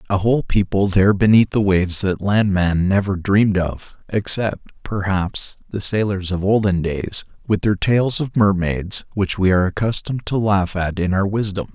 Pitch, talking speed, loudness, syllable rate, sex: 100 Hz, 175 wpm, -19 LUFS, 4.8 syllables/s, male